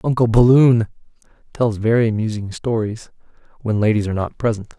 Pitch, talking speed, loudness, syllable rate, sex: 110 Hz, 125 wpm, -18 LUFS, 5.7 syllables/s, male